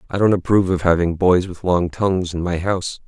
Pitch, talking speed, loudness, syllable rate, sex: 90 Hz, 235 wpm, -18 LUFS, 6.0 syllables/s, male